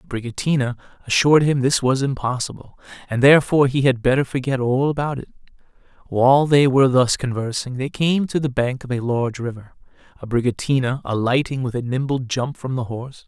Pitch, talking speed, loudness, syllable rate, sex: 130 Hz, 170 wpm, -19 LUFS, 6.0 syllables/s, male